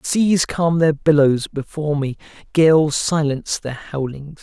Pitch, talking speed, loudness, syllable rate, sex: 150 Hz, 135 wpm, -18 LUFS, 4.0 syllables/s, male